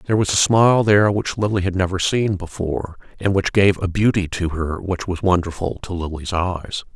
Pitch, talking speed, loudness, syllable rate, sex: 95 Hz, 205 wpm, -19 LUFS, 5.3 syllables/s, male